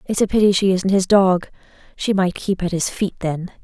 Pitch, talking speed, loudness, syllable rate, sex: 190 Hz, 230 wpm, -18 LUFS, 5.2 syllables/s, female